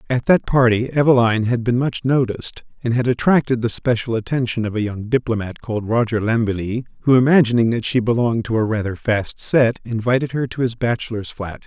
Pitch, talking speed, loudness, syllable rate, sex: 120 Hz, 190 wpm, -19 LUFS, 5.8 syllables/s, male